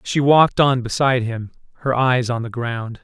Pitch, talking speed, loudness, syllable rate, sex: 125 Hz, 200 wpm, -18 LUFS, 5.0 syllables/s, male